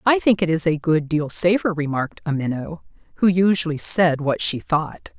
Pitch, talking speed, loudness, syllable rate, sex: 160 Hz, 195 wpm, -20 LUFS, 5.0 syllables/s, female